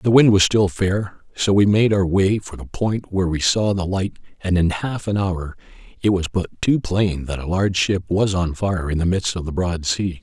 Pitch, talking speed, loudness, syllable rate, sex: 95 Hz, 245 wpm, -20 LUFS, 4.8 syllables/s, male